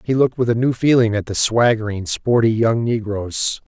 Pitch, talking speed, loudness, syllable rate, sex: 115 Hz, 190 wpm, -18 LUFS, 5.1 syllables/s, male